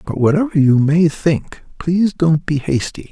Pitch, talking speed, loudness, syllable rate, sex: 160 Hz, 175 wpm, -16 LUFS, 4.6 syllables/s, male